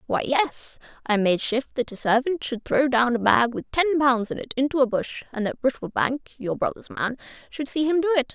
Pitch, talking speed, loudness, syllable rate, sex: 255 Hz, 215 wpm, -23 LUFS, 5.2 syllables/s, female